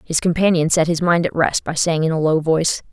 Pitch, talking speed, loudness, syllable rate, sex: 165 Hz, 265 wpm, -17 LUFS, 5.8 syllables/s, female